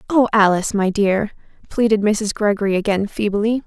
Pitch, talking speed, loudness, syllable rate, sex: 210 Hz, 145 wpm, -18 LUFS, 5.2 syllables/s, female